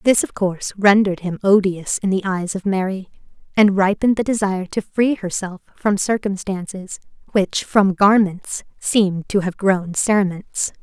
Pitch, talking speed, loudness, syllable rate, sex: 195 Hz, 155 wpm, -19 LUFS, 4.8 syllables/s, female